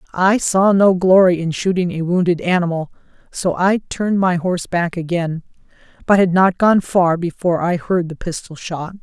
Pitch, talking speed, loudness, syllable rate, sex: 180 Hz, 180 wpm, -17 LUFS, 5.0 syllables/s, female